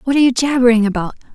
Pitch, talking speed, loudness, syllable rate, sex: 245 Hz, 225 wpm, -14 LUFS, 8.5 syllables/s, female